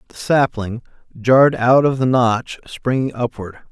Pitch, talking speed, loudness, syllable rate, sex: 120 Hz, 145 wpm, -17 LUFS, 4.4 syllables/s, male